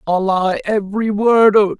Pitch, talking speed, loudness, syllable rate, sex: 205 Hz, 165 wpm, -15 LUFS, 4.4 syllables/s, male